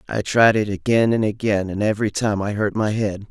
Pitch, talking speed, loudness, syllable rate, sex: 105 Hz, 235 wpm, -20 LUFS, 5.5 syllables/s, male